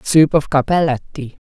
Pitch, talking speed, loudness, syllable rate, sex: 160 Hz, 120 wpm, -16 LUFS, 4.8 syllables/s, female